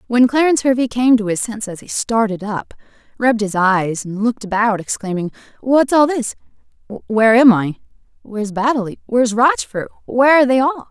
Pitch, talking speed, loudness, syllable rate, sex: 230 Hz, 145 wpm, -16 LUFS, 5.6 syllables/s, female